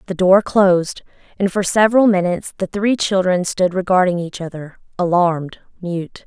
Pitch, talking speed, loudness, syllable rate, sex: 185 Hz, 155 wpm, -17 LUFS, 5.2 syllables/s, female